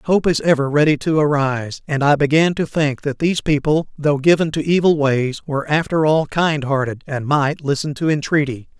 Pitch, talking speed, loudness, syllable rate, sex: 150 Hz, 200 wpm, -18 LUFS, 5.2 syllables/s, male